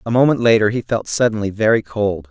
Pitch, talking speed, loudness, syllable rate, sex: 110 Hz, 210 wpm, -17 LUFS, 5.9 syllables/s, male